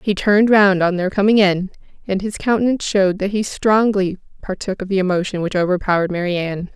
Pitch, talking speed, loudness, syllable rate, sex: 195 Hz, 195 wpm, -17 LUFS, 6.1 syllables/s, female